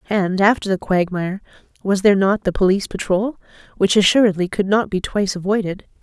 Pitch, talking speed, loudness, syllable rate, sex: 195 Hz, 170 wpm, -18 LUFS, 6.1 syllables/s, female